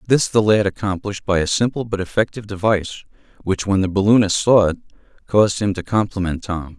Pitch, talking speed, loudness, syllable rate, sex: 100 Hz, 185 wpm, -18 LUFS, 6.3 syllables/s, male